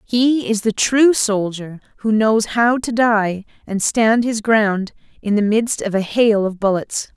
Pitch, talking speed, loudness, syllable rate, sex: 215 Hz, 185 wpm, -17 LUFS, 3.8 syllables/s, female